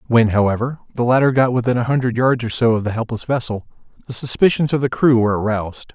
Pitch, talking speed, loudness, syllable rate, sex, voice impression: 120 Hz, 220 wpm, -18 LUFS, 6.5 syllables/s, male, masculine, adult-like, slightly refreshing, friendly